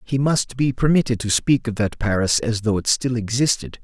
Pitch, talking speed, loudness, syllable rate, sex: 115 Hz, 220 wpm, -20 LUFS, 5.1 syllables/s, male